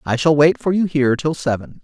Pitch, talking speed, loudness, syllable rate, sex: 140 Hz, 260 wpm, -17 LUFS, 5.9 syllables/s, male